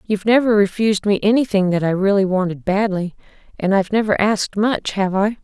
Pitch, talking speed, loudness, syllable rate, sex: 200 Hz, 190 wpm, -18 LUFS, 6.0 syllables/s, female